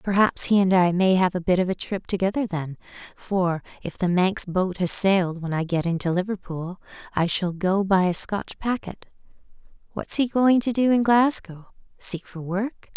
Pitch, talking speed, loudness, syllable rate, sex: 190 Hz, 190 wpm, -22 LUFS, 4.7 syllables/s, female